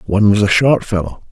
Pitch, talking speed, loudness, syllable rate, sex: 105 Hz, 225 wpm, -14 LUFS, 6.2 syllables/s, male